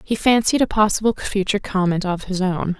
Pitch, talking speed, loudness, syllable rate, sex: 200 Hz, 195 wpm, -19 LUFS, 5.7 syllables/s, female